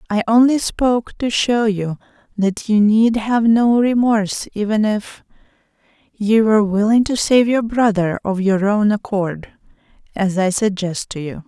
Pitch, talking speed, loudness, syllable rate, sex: 215 Hz, 155 wpm, -17 LUFS, 4.3 syllables/s, female